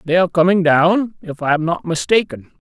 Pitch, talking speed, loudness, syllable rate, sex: 165 Hz, 205 wpm, -16 LUFS, 5.4 syllables/s, male